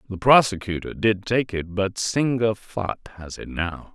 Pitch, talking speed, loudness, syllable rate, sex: 105 Hz, 165 wpm, -22 LUFS, 4.3 syllables/s, male